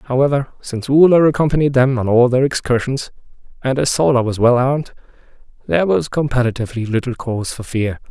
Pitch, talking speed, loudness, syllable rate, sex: 130 Hz, 165 wpm, -16 LUFS, 6.2 syllables/s, male